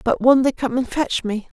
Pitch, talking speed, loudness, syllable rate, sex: 250 Hz, 265 wpm, -19 LUFS, 4.9 syllables/s, female